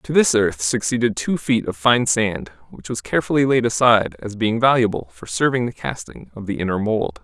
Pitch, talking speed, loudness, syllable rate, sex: 110 Hz, 205 wpm, -19 LUFS, 5.3 syllables/s, male